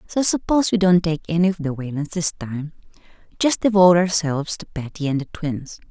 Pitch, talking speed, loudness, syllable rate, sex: 170 Hz, 185 wpm, -20 LUFS, 5.7 syllables/s, female